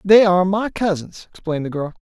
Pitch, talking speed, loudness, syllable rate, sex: 185 Hz, 205 wpm, -18 LUFS, 6.0 syllables/s, male